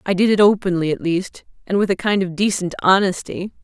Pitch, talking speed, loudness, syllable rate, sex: 190 Hz, 215 wpm, -18 LUFS, 5.7 syllables/s, female